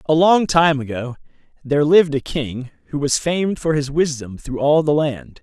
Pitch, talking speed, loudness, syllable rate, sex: 145 Hz, 200 wpm, -18 LUFS, 5.0 syllables/s, male